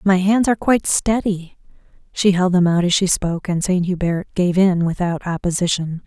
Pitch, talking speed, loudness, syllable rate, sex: 180 Hz, 190 wpm, -18 LUFS, 5.2 syllables/s, female